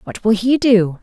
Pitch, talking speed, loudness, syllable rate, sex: 220 Hz, 235 wpm, -15 LUFS, 4.4 syllables/s, female